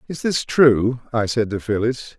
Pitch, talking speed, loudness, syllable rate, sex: 120 Hz, 190 wpm, -19 LUFS, 4.2 syllables/s, male